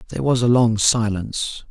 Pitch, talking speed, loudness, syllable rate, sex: 115 Hz, 175 wpm, -19 LUFS, 5.5 syllables/s, male